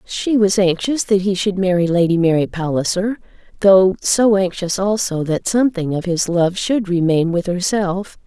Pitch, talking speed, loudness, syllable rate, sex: 190 Hz, 165 wpm, -17 LUFS, 4.6 syllables/s, female